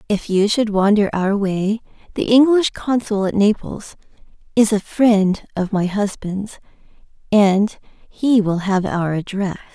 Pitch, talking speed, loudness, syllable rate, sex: 205 Hz, 140 wpm, -18 LUFS, 3.8 syllables/s, female